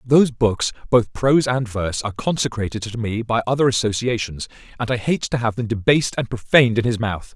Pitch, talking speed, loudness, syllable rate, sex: 115 Hz, 205 wpm, -20 LUFS, 6.0 syllables/s, male